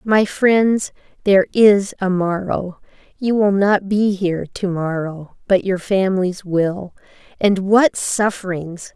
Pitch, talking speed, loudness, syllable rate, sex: 195 Hz, 135 wpm, -17 LUFS, 3.7 syllables/s, female